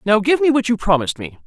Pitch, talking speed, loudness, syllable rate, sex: 200 Hz, 285 wpm, -17 LUFS, 6.9 syllables/s, female